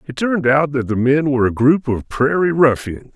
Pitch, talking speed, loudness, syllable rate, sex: 140 Hz, 230 wpm, -16 LUFS, 5.4 syllables/s, male